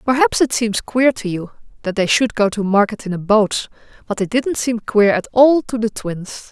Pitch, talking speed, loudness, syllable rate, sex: 225 Hz, 230 wpm, -17 LUFS, 4.8 syllables/s, female